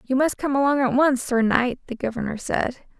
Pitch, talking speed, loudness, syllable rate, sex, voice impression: 255 Hz, 220 wpm, -22 LUFS, 5.5 syllables/s, female, feminine, slightly young, powerful, bright, slightly soft, slightly muffled, slightly cute, friendly, lively, kind